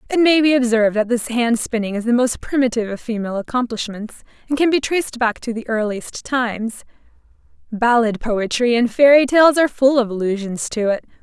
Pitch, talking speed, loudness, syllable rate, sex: 240 Hz, 185 wpm, -18 LUFS, 5.7 syllables/s, female